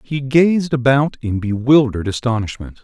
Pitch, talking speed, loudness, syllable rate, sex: 130 Hz, 125 wpm, -16 LUFS, 4.9 syllables/s, male